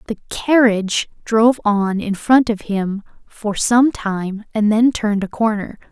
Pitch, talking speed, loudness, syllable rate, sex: 215 Hz, 160 wpm, -17 LUFS, 4.2 syllables/s, female